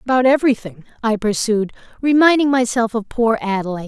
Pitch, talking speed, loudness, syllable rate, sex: 230 Hz, 140 wpm, -17 LUFS, 6.1 syllables/s, female